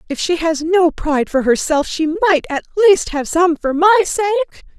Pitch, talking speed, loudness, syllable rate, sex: 340 Hz, 200 wpm, -15 LUFS, 5.3 syllables/s, female